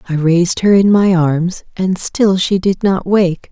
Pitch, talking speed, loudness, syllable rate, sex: 185 Hz, 205 wpm, -13 LUFS, 4.0 syllables/s, female